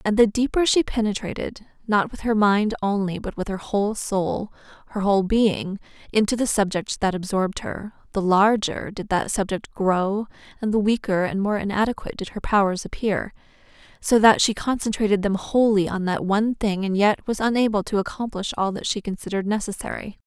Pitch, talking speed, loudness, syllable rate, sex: 205 Hz, 180 wpm, -22 LUFS, 5.4 syllables/s, female